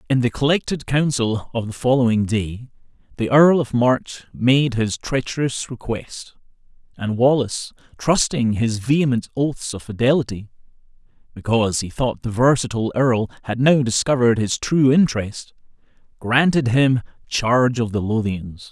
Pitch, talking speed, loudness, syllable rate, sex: 120 Hz, 135 wpm, -19 LUFS, 3.4 syllables/s, male